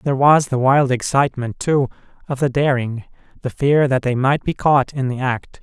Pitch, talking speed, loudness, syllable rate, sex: 135 Hz, 205 wpm, -18 LUFS, 5.0 syllables/s, male